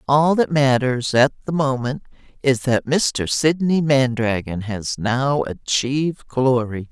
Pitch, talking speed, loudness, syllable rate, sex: 135 Hz, 130 wpm, -19 LUFS, 3.7 syllables/s, female